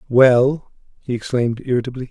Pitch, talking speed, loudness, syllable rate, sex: 125 Hz, 115 wpm, -18 LUFS, 5.5 syllables/s, male